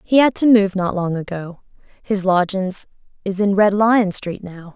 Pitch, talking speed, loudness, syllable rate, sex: 195 Hz, 190 wpm, -18 LUFS, 4.4 syllables/s, female